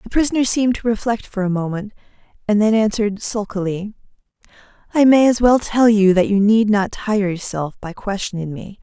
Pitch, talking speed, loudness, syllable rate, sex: 210 Hz, 185 wpm, -17 LUFS, 5.4 syllables/s, female